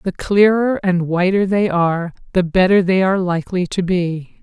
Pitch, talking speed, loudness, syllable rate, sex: 185 Hz, 175 wpm, -16 LUFS, 4.9 syllables/s, female